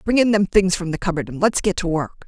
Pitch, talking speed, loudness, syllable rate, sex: 190 Hz, 315 wpm, -20 LUFS, 6.0 syllables/s, female